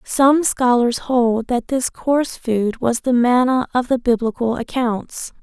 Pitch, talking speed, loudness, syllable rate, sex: 245 Hz, 155 wpm, -18 LUFS, 3.8 syllables/s, female